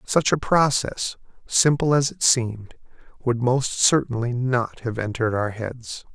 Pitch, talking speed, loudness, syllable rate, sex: 125 Hz, 145 wpm, -22 LUFS, 4.2 syllables/s, male